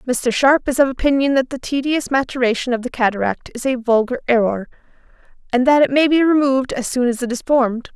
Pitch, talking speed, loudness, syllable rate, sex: 255 Hz, 210 wpm, -17 LUFS, 6.1 syllables/s, female